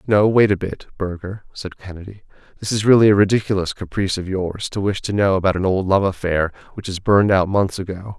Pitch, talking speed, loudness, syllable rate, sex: 95 Hz, 220 wpm, -18 LUFS, 5.9 syllables/s, male